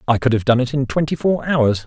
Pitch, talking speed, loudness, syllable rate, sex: 130 Hz, 290 wpm, -18 LUFS, 6.0 syllables/s, male